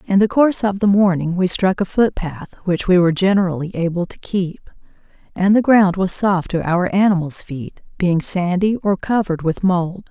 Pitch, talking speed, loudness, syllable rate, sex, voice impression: 185 Hz, 195 wpm, -17 LUFS, 5.0 syllables/s, female, feminine, adult-like, tensed, hard, clear, fluent, intellectual, calm, elegant, lively, slightly sharp